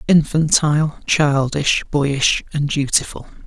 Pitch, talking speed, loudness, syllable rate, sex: 145 Hz, 85 wpm, -17 LUFS, 3.7 syllables/s, male